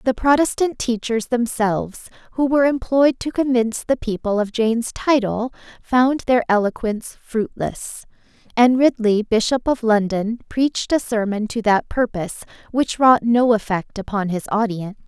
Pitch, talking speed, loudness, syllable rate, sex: 230 Hz, 145 wpm, -19 LUFS, 4.8 syllables/s, female